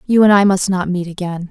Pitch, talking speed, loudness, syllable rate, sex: 190 Hz, 280 wpm, -15 LUFS, 5.7 syllables/s, female